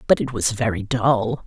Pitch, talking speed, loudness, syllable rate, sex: 115 Hz, 205 wpm, -21 LUFS, 4.7 syllables/s, male